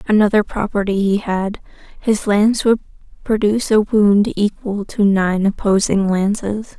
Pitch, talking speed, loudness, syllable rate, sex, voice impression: 205 Hz, 135 wpm, -17 LUFS, 4.5 syllables/s, female, feminine, slightly young, relaxed, slightly weak, slightly dark, slightly muffled, slightly cute, calm, friendly, slightly reassuring, kind, modest